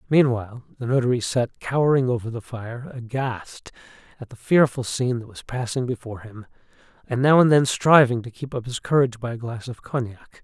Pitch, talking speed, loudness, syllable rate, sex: 125 Hz, 190 wpm, -22 LUFS, 5.6 syllables/s, male